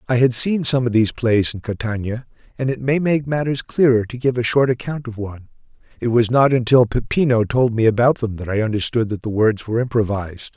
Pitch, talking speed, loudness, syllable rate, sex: 120 Hz, 220 wpm, -19 LUFS, 5.9 syllables/s, male